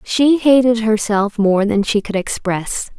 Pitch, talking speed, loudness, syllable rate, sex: 220 Hz, 160 wpm, -16 LUFS, 3.9 syllables/s, female